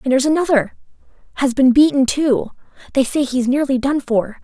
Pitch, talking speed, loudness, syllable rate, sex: 265 Hz, 160 wpm, -17 LUFS, 5.6 syllables/s, female